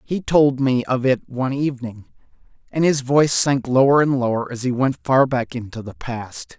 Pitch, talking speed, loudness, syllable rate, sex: 130 Hz, 200 wpm, -19 LUFS, 5.0 syllables/s, male